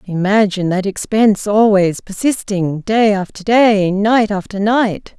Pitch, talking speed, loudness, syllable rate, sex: 205 Hz, 125 wpm, -15 LUFS, 4.1 syllables/s, female